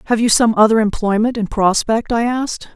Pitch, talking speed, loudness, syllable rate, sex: 220 Hz, 195 wpm, -15 LUFS, 5.6 syllables/s, female